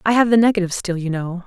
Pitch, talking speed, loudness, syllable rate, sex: 195 Hz, 285 wpm, -18 LUFS, 7.3 syllables/s, female